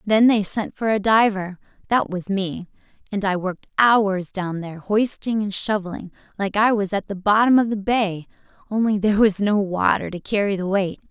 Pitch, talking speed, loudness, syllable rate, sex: 205 Hz, 185 wpm, -21 LUFS, 5.0 syllables/s, female